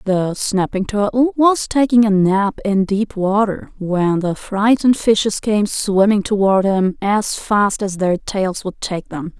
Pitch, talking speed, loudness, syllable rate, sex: 205 Hz, 165 wpm, -17 LUFS, 3.9 syllables/s, female